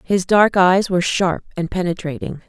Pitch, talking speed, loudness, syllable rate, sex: 180 Hz, 170 wpm, -17 LUFS, 5.0 syllables/s, female